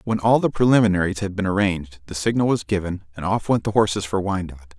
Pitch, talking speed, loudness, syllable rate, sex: 95 Hz, 225 wpm, -21 LUFS, 6.7 syllables/s, male